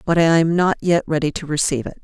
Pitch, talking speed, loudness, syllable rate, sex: 160 Hz, 265 wpm, -18 LUFS, 6.5 syllables/s, female